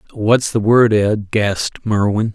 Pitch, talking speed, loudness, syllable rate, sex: 105 Hz, 155 wpm, -16 LUFS, 3.9 syllables/s, male